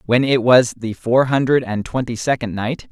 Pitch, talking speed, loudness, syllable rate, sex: 120 Hz, 205 wpm, -17 LUFS, 4.7 syllables/s, male